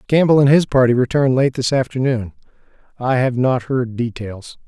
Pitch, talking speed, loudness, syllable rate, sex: 130 Hz, 155 wpm, -17 LUFS, 5.3 syllables/s, male